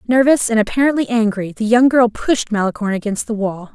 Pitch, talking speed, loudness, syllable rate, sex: 225 Hz, 190 wpm, -16 LUFS, 6.0 syllables/s, female